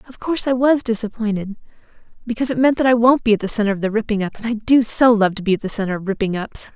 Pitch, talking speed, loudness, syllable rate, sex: 225 Hz, 265 wpm, -18 LUFS, 6.8 syllables/s, female